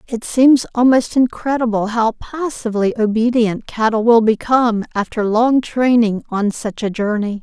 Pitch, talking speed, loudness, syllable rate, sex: 230 Hz, 135 wpm, -16 LUFS, 4.6 syllables/s, female